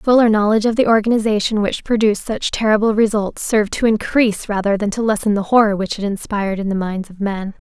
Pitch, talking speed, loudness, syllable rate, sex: 210 Hz, 210 wpm, -17 LUFS, 6.2 syllables/s, female